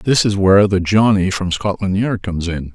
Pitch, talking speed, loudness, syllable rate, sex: 95 Hz, 220 wpm, -16 LUFS, 5.2 syllables/s, male